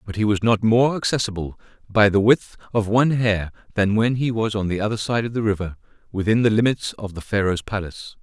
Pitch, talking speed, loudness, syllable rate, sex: 105 Hz, 220 wpm, -21 LUFS, 5.9 syllables/s, male